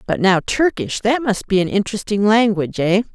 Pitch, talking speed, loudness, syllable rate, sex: 210 Hz, 190 wpm, -17 LUFS, 5.7 syllables/s, female